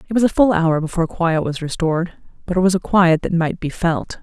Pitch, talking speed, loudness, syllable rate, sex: 175 Hz, 255 wpm, -18 LUFS, 5.8 syllables/s, female